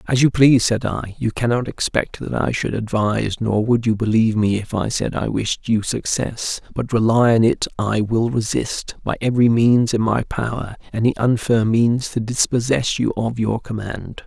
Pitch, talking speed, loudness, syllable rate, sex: 115 Hz, 195 wpm, -19 LUFS, 4.6 syllables/s, male